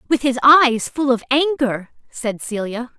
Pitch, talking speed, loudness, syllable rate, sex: 255 Hz, 160 wpm, -17 LUFS, 4.0 syllables/s, female